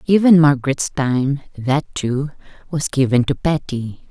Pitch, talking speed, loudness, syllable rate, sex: 140 Hz, 115 wpm, -18 LUFS, 4.1 syllables/s, female